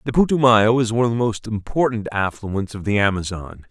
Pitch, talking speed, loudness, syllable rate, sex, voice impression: 110 Hz, 195 wpm, -19 LUFS, 5.7 syllables/s, male, very masculine, very adult-like, middle-aged, tensed, powerful, bright, slightly soft, slightly muffled, fluent, cool, very intellectual, slightly refreshing, sincere, calm, very mature, friendly, reassuring, elegant, slightly wild, sweet, slightly lively, slightly strict, slightly intense